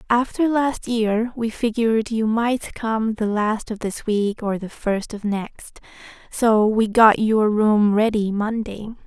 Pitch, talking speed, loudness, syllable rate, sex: 220 Hz, 165 wpm, -20 LUFS, 3.7 syllables/s, female